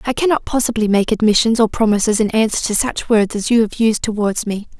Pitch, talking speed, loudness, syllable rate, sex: 220 Hz, 225 wpm, -16 LUFS, 5.9 syllables/s, female